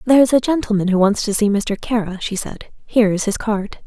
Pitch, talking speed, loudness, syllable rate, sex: 215 Hz, 235 wpm, -18 LUFS, 5.5 syllables/s, female